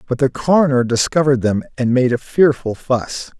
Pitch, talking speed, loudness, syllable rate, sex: 130 Hz, 175 wpm, -16 LUFS, 5.3 syllables/s, male